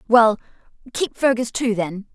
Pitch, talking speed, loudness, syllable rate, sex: 230 Hz, 140 wpm, -20 LUFS, 4.3 syllables/s, female